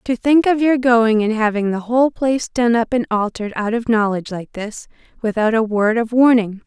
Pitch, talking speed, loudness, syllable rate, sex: 230 Hz, 215 wpm, -17 LUFS, 5.4 syllables/s, female